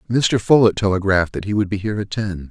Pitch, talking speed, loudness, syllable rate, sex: 100 Hz, 240 wpm, -18 LUFS, 6.5 syllables/s, male